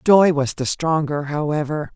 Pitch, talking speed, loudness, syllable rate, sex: 155 Hz, 155 wpm, -20 LUFS, 4.2 syllables/s, female